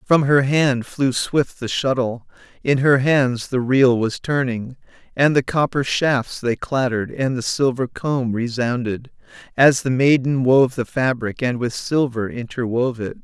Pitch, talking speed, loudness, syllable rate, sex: 130 Hz, 165 wpm, -19 LUFS, 4.2 syllables/s, male